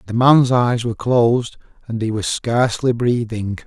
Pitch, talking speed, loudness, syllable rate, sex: 120 Hz, 165 wpm, -17 LUFS, 4.8 syllables/s, male